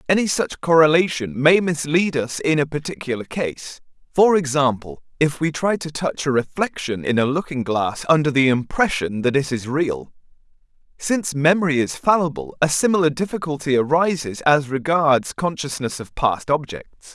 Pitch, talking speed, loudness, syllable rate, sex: 145 Hz, 155 wpm, -20 LUFS, 4.9 syllables/s, male